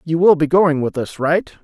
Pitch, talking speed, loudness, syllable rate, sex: 155 Hz, 255 wpm, -16 LUFS, 4.8 syllables/s, male